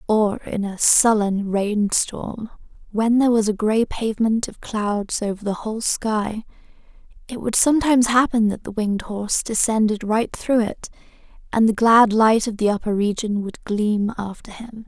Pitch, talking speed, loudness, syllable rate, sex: 215 Hz, 170 wpm, -20 LUFS, 4.6 syllables/s, female